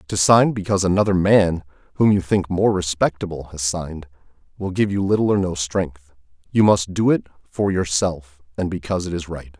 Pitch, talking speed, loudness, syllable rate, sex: 90 Hz, 190 wpm, -20 LUFS, 5.3 syllables/s, male